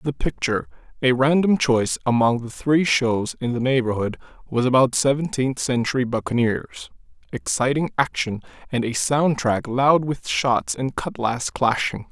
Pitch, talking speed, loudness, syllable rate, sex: 130 Hz, 145 wpm, -21 LUFS, 4.6 syllables/s, male